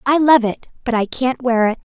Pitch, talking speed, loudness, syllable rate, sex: 245 Hz, 250 wpm, -17 LUFS, 5.1 syllables/s, female